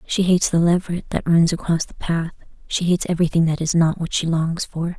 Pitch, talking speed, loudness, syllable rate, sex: 170 Hz, 230 wpm, -20 LUFS, 6.1 syllables/s, female